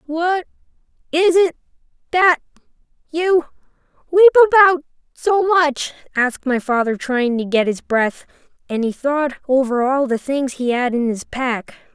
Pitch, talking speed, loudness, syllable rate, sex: 290 Hz, 120 wpm, -17 LUFS, 4.5 syllables/s, female